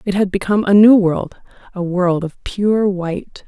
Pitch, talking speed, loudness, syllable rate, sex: 190 Hz, 190 wpm, -16 LUFS, 4.6 syllables/s, female